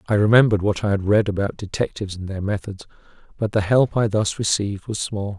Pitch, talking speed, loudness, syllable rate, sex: 100 Hz, 210 wpm, -21 LUFS, 6.2 syllables/s, male